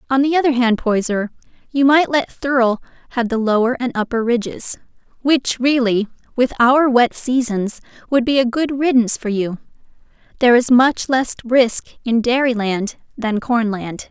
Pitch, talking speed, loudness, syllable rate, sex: 245 Hz, 165 wpm, -17 LUFS, 4.7 syllables/s, female